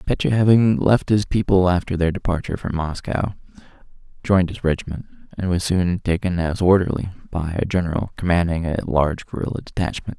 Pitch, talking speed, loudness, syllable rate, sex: 90 Hz, 160 wpm, -20 LUFS, 5.8 syllables/s, male